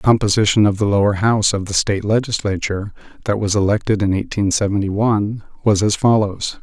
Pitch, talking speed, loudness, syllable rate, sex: 105 Hz, 180 wpm, -17 LUFS, 6.1 syllables/s, male